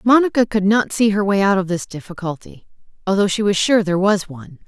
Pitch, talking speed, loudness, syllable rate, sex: 195 Hz, 220 wpm, -17 LUFS, 6.1 syllables/s, female